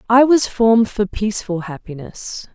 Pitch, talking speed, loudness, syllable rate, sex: 215 Hz, 140 wpm, -17 LUFS, 4.7 syllables/s, female